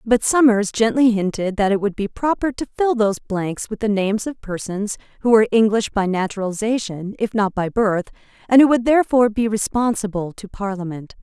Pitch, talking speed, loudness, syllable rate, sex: 215 Hz, 185 wpm, -19 LUFS, 5.5 syllables/s, female